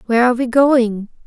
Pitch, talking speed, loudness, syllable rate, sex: 240 Hz, 190 wpm, -15 LUFS, 6.3 syllables/s, female